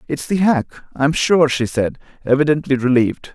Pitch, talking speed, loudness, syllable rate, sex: 140 Hz, 180 wpm, -17 LUFS, 5.6 syllables/s, male